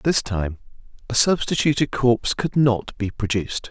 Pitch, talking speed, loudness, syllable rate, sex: 120 Hz, 145 wpm, -21 LUFS, 4.7 syllables/s, male